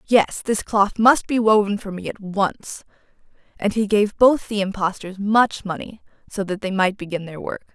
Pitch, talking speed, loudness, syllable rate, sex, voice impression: 205 Hz, 195 wpm, -20 LUFS, 4.7 syllables/s, female, feminine, slightly young, slightly powerful, slightly bright, slightly clear, slightly cute, slightly friendly, lively, slightly sharp